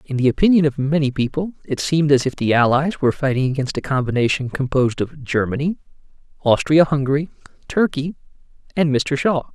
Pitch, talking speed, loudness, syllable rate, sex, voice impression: 140 Hz, 165 wpm, -19 LUFS, 6.0 syllables/s, male, masculine, adult-like, tensed, powerful, bright, clear, fluent, intellectual, friendly, wild, lively, kind, light